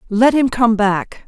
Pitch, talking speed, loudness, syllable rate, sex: 230 Hz, 190 wpm, -15 LUFS, 3.8 syllables/s, female